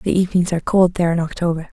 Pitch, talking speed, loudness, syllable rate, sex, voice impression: 175 Hz, 235 wpm, -18 LUFS, 7.7 syllables/s, female, feminine, adult-like, relaxed, weak, soft, raspy, slightly intellectual, reassuring, slightly strict, modest